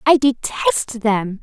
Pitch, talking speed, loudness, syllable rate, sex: 245 Hz, 125 wpm, -18 LUFS, 3.1 syllables/s, female